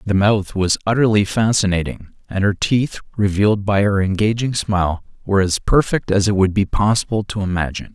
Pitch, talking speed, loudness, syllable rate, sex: 100 Hz, 175 wpm, -18 LUFS, 5.6 syllables/s, male